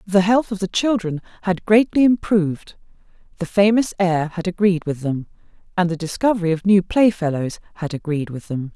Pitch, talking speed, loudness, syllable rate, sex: 185 Hz, 170 wpm, -19 LUFS, 5.3 syllables/s, female